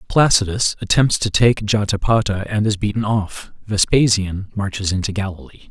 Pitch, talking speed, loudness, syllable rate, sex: 100 Hz, 135 wpm, -18 LUFS, 5.0 syllables/s, male